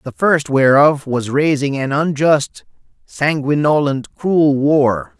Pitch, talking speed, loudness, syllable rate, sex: 145 Hz, 115 wpm, -15 LUFS, 3.5 syllables/s, male